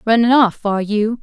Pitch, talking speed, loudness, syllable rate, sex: 220 Hz, 195 wpm, -15 LUFS, 5.4 syllables/s, female